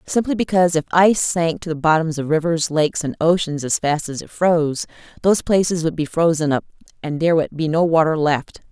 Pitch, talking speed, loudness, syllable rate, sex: 165 Hz, 215 wpm, -19 LUFS, 5.9 syllables/s, female